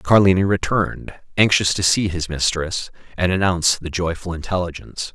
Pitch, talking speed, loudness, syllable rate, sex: 90 Hz, 140 wpm, -19 LUFS, 5.3 syllables/s, male